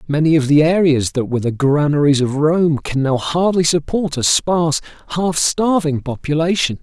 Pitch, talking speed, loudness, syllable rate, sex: 155 Hz, 165 wpm, -16 LUFS, 4.9 syllables/s, male